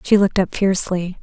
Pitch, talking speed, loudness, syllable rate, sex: 190 Hz, 195 wpm, -18 LUFS, 6.3 syllables/s, female